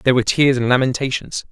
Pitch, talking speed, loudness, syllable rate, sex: 130 Hz, 195 wpm, -17 LUFS, 7.3 syllables/s, male